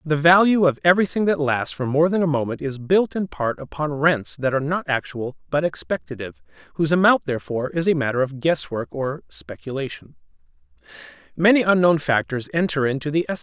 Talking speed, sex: 190 wpm, male